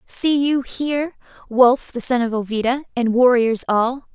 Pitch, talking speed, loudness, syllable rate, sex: 250 Hz, 160 wpm, -18 LUFS, 4.3 syllables/s, female